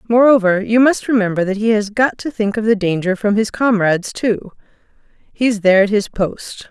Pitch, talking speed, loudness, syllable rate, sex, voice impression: 215 Hz, 195 wpm, -16 LUFS, 5.2 syllables/s, female, very feminine, very adult-like, middle-aged, slightly thin, slightly tensed, slightly powerful, slightly dark, very hard, very clear, very fluent, very cool, very intellectual, slightly refreshing, very sincere, very calm, slightly friendly, very reassuring, unique, very elegant, very strict, slightly intense, very sharp